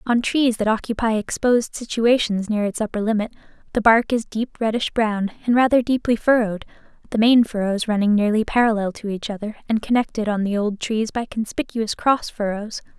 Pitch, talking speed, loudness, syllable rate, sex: 220 Hz, 180 wpm, -20 LUFS, 5.5 syllables/s, female